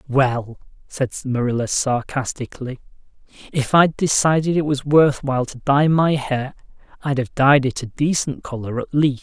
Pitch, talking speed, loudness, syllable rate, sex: 135 Hz, 155 wpm, -19 LUFS, 4.7 syllables/s, male